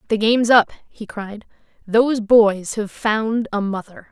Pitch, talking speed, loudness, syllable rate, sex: 215 Hz, 160 wpm, -18 LUFS, 4.3 syllables/s, female